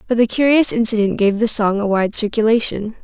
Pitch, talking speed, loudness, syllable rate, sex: 220 Hz, 200 wpm, -16 LUFS, 5.7 syllables/s, female